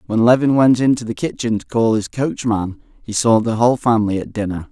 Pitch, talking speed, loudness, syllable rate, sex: 115 Hz, 215 wpm, -17 LUFS, 5.8 syllables/s, male